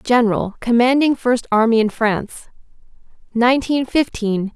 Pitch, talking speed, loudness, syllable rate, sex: 235 Hz, 105 wpm, -17 LUFS, 4.8 syllables/s, female